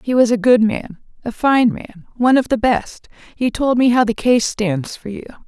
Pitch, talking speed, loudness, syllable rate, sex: 235 Hz, 230 wpm, -16 LUFS, 4.7 syllables/s, female